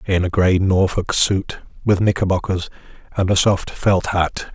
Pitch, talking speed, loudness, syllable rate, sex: 95 Hz, 160 wpm, -18 LUFS, 4.2 syllables/s, male